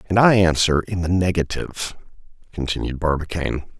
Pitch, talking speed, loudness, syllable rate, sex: 85 Hz, 125 wpm, -20 LUFS, 5.8 syllables/s, male